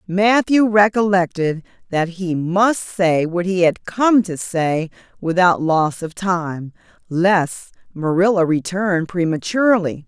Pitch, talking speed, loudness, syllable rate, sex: 180 Hz, 120 wpm, -18 LUFS, 3.7 syllables/s, female